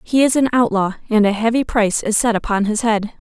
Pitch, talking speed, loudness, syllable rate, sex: 220 Hz, 240 wpm, -17 LUFS, 5.9 syllables/s, female